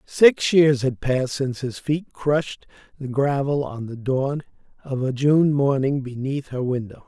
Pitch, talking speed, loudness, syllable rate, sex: 135 Hz, 170 wpm, -22 LUFS, 4.3 syllables/s, male